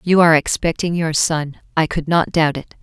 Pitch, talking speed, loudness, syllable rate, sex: 160 Hz, 210 wpm, -17 LUFS, 5.1 syllables/s, female